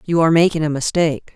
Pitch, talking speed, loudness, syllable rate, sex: 160 Hz, 220 wpm, -17 LUFS, 7.3 syllables/s, female